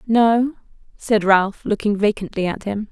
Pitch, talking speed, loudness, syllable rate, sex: 210 Hz, 145 wpm, -19 LUFS, 4.3 syllables/s, female